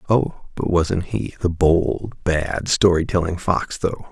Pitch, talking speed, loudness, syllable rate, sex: 90 Hz, 160 wpm, -20 LUFS, 3.7 syllables/s, male